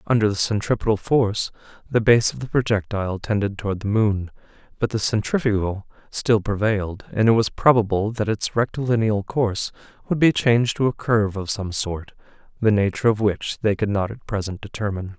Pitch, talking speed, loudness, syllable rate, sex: 105 Hz, 180 wpm, -21 LUFS, 5.7 syllables/s, male